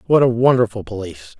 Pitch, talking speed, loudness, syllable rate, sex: 120 Hz, 170 wpm, -16 LUFS, 6.6 syllables/s, male